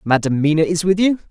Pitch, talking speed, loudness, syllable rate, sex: 165 Hz, 230 wpm, -17 LUFS, 6.3 syllables/s, male